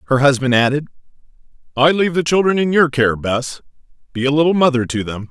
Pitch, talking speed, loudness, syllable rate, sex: 140 Hz, 190 wpm, -16 LUFS, 6.2 syllables/s, male